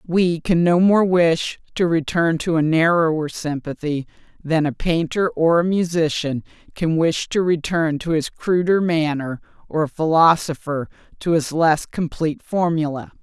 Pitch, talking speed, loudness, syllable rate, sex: 160 Hz, 150 wpm, -20 LUFS, 4.4 syllables/s, female